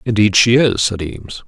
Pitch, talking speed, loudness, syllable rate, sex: 105 Hz, 205 wpm, -14 LUFS, 5.2 syllables/s, male